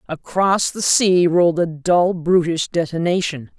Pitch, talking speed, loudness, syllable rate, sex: 170 Hz, 135 wpm, -17 LUFS, 4.2 syllables/s, female